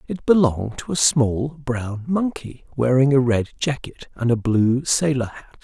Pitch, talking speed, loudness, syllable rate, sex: 130 Hz, 170 wpm, -20 LUFS, 4.3 syllables/s, male